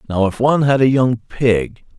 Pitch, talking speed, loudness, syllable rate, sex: 120 Hz, 210 wpm, -16 LUFS, 4.9 syllables/s, male